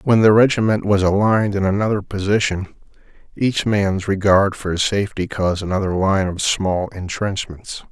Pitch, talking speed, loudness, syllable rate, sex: 100 Hz, 150 wpm, -18 LUFS, 5.1 syllables/s, male